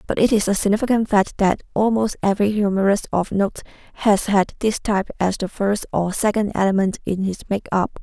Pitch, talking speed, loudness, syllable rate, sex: 200 Hz, 185 wpm, -20 LUFS, 5.6 syllables/s, female